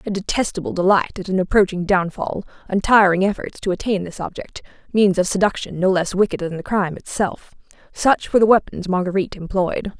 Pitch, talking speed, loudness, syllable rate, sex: 190 Hz, 170 wpm, -19 LUFS, 5.8 syllables/s, female